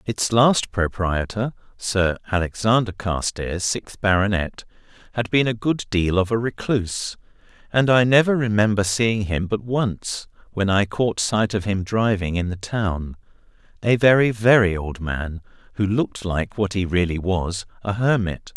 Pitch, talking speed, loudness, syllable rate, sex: 105 Hz, 150 wpm, -21 LUFS, 4.3 syllables/s, male